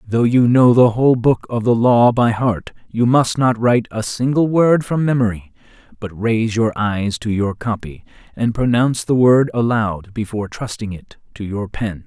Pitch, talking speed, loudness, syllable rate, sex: 115 Hz, 190 wpm, -17 LUFS, 4.8 syllables/s, male